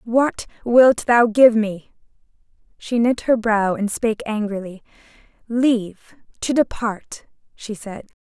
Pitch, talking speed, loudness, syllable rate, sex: 225 Hz, 125 wpm, -19 LUFS, 3.9 syllables/s, female